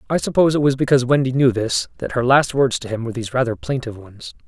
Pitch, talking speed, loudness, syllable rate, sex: 125 Hz, 255 wpm, -18 LUFS, 7.1 syllables/s, male